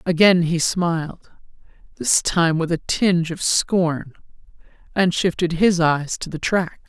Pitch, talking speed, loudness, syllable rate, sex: 170 Hz, 150 wpm, -19 LUFS, 4.0 syllables/s, female